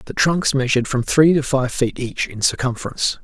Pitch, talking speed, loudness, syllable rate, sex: 130 Hz, 205 wpm, -19 LUFS, 5.6 syllables/s, male